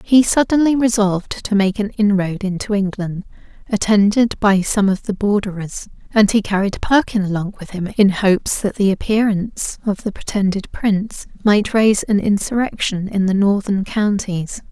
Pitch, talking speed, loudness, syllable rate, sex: 205 Hz, 160 wpm, -17 LUFS, 4.9 syllables/s, female